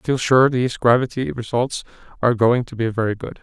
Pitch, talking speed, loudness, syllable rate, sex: 120 Hz, 210 wpm, -19 LUFS, 6.2 syllables/s, male